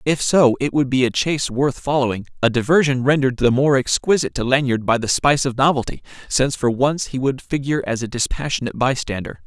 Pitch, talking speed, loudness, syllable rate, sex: 130 Hz, 195 wpm, -19 LUFS, 6.2 syllables/s, male